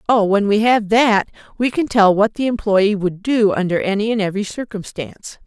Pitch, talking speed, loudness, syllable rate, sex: 210 Hz, 200 wpm, -17 LUFS, 5.3 syllables/s, female